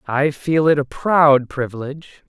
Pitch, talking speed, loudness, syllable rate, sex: 145 Hz, 160 wpm, -17 LUFS, 4.6 syllables/s, male